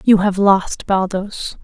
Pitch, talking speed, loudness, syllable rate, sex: 195 Hz, 145 wpm, -17 LUFS, 3.3 syllables/s, female